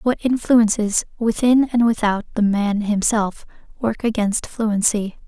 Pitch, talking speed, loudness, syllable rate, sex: 220 Hz, 125 wpm, -19 LUFS, 3.9 syllables/s, female